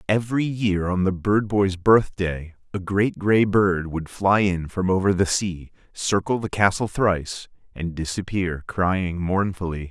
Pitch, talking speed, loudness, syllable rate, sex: 95 Hz, 160 wpm, -22 LUFS, 4.1 syllables/s, male